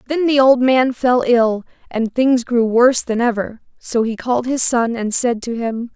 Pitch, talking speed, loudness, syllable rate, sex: 240 Hz, 210 wpm, -16 LUFS, 4.5 syllables/s, female